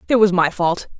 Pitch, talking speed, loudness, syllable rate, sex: 190 Hz, 240 wpm, -17 LUFS, 5.4 syllables/s, female